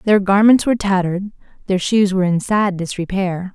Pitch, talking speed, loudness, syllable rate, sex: 195 Hz, 170 wpm, -17 LUFS, 5.4 syllables/s, female